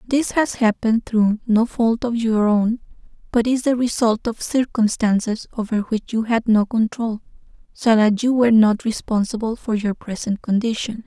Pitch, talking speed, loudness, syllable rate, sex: 225 Hz, 170 wpm, -19 LUFS, 4.7 syllables/s, female